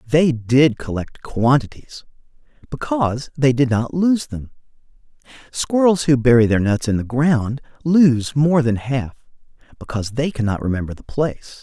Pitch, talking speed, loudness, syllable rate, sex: 130 Hz, 145 wpm, -18 LUFS, 4.6 syllables/s, male